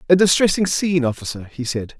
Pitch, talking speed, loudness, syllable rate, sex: 150 Hz, 180 wpm, -19 LUFS, 6.2 syllables/s, male